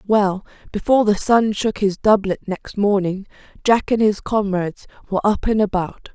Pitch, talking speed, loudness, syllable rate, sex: 205 Hz, 165 wpm, -19 LUFS, 5.0 syllables/s, female